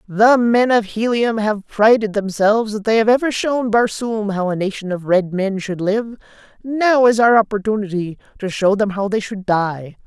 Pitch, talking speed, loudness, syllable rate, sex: 210 Hz, 190 wpm, -17 LUFS, 4.7 syllables/s, female